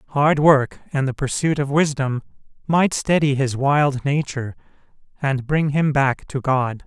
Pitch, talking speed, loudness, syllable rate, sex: 140 Hz, 155 wpm, -20 LUFS, 4.3 syllables/s, male